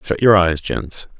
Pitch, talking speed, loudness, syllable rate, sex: 90 Hz, 200 wpm, -16 LUFS, 4.0 syllables/s, male